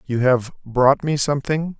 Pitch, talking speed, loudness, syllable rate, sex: 135 Hz, 165 wpm, -19 LUFS, 4.5 syllables/s, male